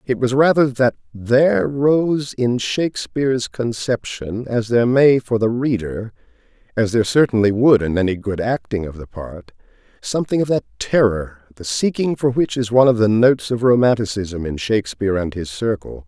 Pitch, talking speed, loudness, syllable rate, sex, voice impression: 115 Hz, 170 wpm, -18 LUFS, 5.1 syllables/s, male, masculine, middle-aged, thick, tensed, powerful, bright, slightly hard, halting, mature, friendly, slightly reassuring, wild, lively, slightly kind, intense